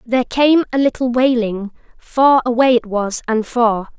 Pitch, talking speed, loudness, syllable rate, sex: 240 Hz, 165 wpm, -16 LUFS, 4.3 syllables/s, female